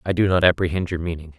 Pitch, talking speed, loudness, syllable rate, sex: 85 Hz, 260 wpm, -21 LUFS, 7.1 syllables/s, male